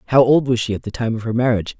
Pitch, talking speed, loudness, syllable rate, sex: 120 Hz, 335 wpm, -18 LUFS, 7.7 syllables/s, female